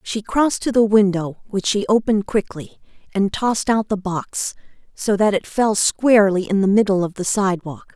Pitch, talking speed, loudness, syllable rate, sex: 205 Hz, 190 wpm, -19 LUFS, 5.2 syllables/s, female